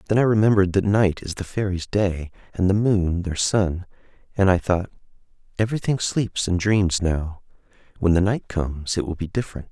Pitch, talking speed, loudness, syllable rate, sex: 95 Hz, 180 wpm, -22 LUFS, 5.3 syllables/s, male